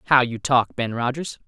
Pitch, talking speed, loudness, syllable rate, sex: 125 Hz, 205 wpm, -22 LUFS, 5.0 syllables/s, male